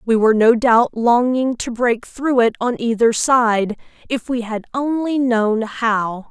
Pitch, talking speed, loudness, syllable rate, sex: 235 Hz, 160 wpm, -17 LUFS, 3.9 syllables/s, female